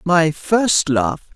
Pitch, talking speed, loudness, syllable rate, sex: 165 Hz, 135 wpm, -17 LUFS, 3.7 syllables/s, male